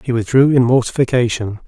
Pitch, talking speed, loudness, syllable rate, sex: 120 Hz, 145 wpm, -15 LUFS, 5.9 syllables/s, male